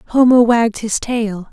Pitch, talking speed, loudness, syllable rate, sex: 225 Hz, 160 wpm, -14 LUFS, 4.1 syllables/s, female